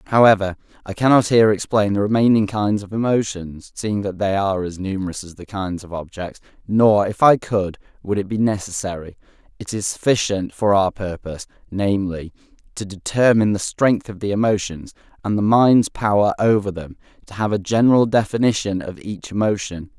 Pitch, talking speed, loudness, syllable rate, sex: 100 Hz, 170 wpm, -19 LUFS, 4.7 syllables/s, male